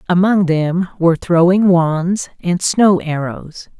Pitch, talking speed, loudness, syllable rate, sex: 175 Hz, 125 wpm, -15 LUFS, 3.6 syllables/s, female